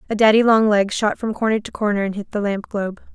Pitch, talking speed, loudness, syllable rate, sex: 210 Hz, 265 wpm, -19 LUFS, 6.3 syllables/s, female